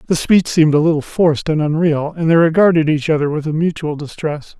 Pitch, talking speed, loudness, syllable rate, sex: 155 Hz, 220 wpm, -15 LUFS, 5.9 syllables/s, male